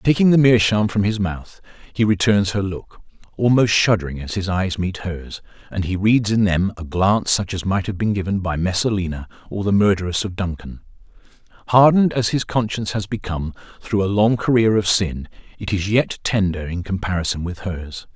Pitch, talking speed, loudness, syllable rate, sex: 100 Hz, 185 wpm, -19 LUFS, 5.3 syllables/s, male